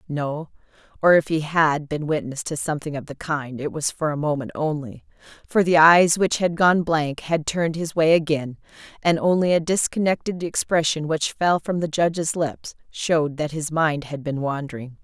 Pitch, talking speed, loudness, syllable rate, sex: 155 Hz, 190 wpm, -21 LUFS, 4.9 syllables/s, female